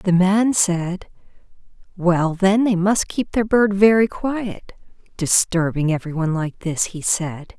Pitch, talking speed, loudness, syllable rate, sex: 185 Hz, 150 wpm, -19 LUFS, 4.0 syllables/s, female